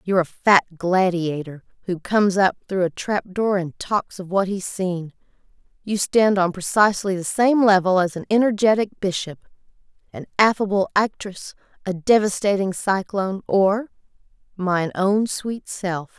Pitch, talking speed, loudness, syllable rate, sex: 190 Hz, 140 wpm, -20 LUFS, 4.6 syllables/s, female